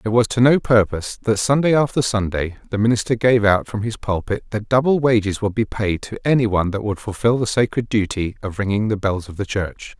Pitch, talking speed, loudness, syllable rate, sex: 110 Hz, 220 wpm, -19 LUFS, 5.6 syllables/s, male